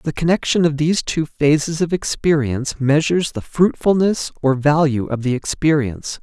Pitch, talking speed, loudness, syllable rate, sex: 150 Hz, 155 wpm, -18 LUFS, 5.2 syllables/s, male